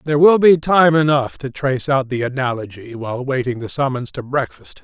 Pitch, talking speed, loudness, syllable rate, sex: 135 Hz, 200 wpm, -17 LUFS, 5.5 syllables/s, male